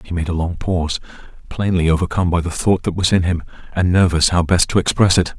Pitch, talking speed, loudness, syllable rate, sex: 85 Hz, 235 wpm, -17 LUFS, 6.2 syllables/s, male